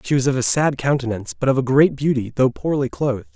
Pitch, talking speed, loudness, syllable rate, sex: 135 Hz, 250 wpm, -19 LUFS, 6.5 syllables/s, male